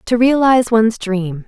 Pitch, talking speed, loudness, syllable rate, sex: 225 Hz, 165 wpm, -14 LUFS, 5.1 syllables/s, female